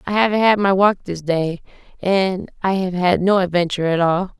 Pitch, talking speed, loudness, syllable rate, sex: 185 Hz, 205 wpm, -18 LUFS, 5.1 syllables/s, female